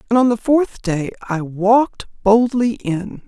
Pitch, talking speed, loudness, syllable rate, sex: 220 Hz, 165 wpm, -17 LUFS, 4.1 syllables/s, female